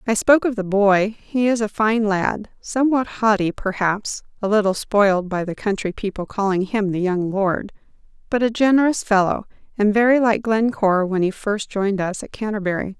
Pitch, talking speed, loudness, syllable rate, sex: 210 Hz, 180 wpm, -20 LUFS, 5.2 syllables/s, female